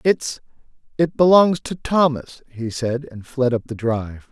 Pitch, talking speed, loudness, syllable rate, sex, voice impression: 135 Hz, 155 wpm, -20 LUFS, 3.7 syllables/s, male, masculine, middle-aged, slightly thick, cool, slightly elegant, slightly wild